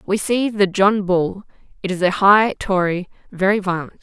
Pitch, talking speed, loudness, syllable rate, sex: 195 Hz, 180 wpm, -18 LUFS, 4.6 syllables/s, female